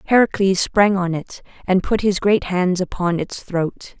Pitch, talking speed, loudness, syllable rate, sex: 185 Hz, 180 wpm, -19 LUFS, 4.2 syllables/s, female